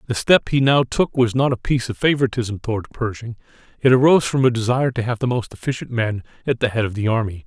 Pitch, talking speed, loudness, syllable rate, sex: 120 Hz, 235 wpm, -19 LUFS, 6.6 syllables/s, male